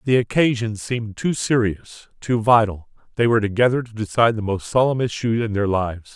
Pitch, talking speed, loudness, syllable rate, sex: 110 Hz, 185 wpm, -20 LUFS, 5.7 syllables/s, male